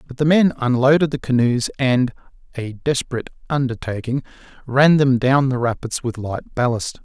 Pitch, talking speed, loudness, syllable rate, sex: 130 Hz, 135 wpm, -19 LUFS, 5.2 syllables/s, male